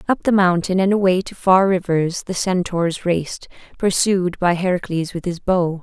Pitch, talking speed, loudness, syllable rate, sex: 180 Hz, 175 wpm, -18 LUFS, 4.7 syllables/s, female